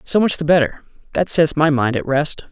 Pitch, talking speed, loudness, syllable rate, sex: 155 Hz, 240 wpm, -17 LUFS, 5.2 syllables/s, male